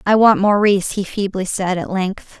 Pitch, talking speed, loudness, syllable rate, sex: 195 Hz, 200 wpm, -17 LUFS, 4.9 syllables/s, female